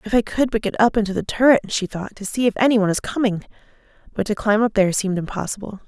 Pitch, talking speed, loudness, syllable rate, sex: 215 Hz, 255 wpm, -20 LUFS, 7.1 syllables/s, female